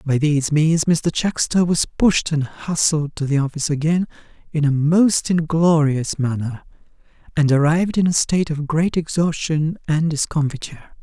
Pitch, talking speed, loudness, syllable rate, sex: 155 Hz, 150 wpm, -19 LUFS, 4.8 syllables/s, male